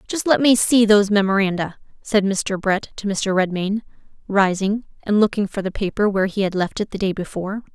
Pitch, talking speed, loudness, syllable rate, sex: 200 Hz, 200 wpm, -20 LUFS, 5.6 syllables/s, female